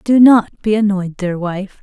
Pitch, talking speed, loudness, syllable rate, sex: 200 Hz, 195 wpm, -14 LUFS, 4.4 syllables/s, female